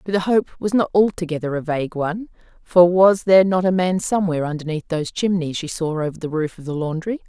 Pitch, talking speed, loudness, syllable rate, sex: 175 Hz, 225 wpm, -19 LUFS, 6.4 syllables/s, female